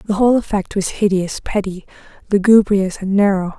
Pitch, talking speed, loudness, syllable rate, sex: 200 Hz, 150 wpm, -16 LUFS, 5.4 syllables/s, female